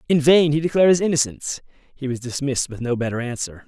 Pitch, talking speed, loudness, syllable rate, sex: 140 Hz, 210 wpm, -20 LUFS, 6.5 syllables/s, male